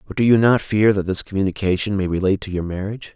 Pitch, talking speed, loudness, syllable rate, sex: 100 Hz, 250 wpm, -19 LUFS, 7.0 syllables/s, male